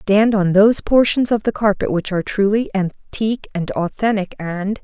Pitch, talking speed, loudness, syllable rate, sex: 205 Hz, 160 wpm, -18 LUFS, 4.9 syllables/s, female